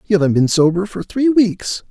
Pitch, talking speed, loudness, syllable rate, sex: 195 Hz, 220 wpm, -16 LUFS, 5.1 syllables/s, male